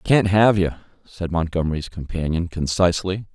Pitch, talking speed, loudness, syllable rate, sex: 90 Hz, 125 wpm, -21 LUFS, 5.2 syllables/s, male